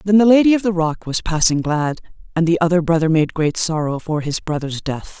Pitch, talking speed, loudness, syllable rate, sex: 170 Hz, 230 wpm, -18 LUFS, 5.5 syllables/s, female